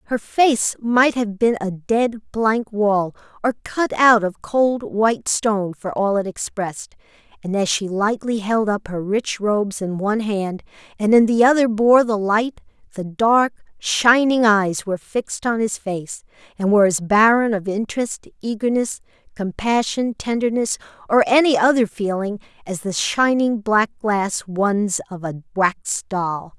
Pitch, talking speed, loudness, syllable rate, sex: 215 Hz, 160 wpm, -19 LUFS, 4.2 syllables/s, female